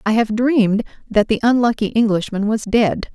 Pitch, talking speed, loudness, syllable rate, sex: 220 Hz, 170 wpm, -17 LUFS, 5.1 syllables/s, female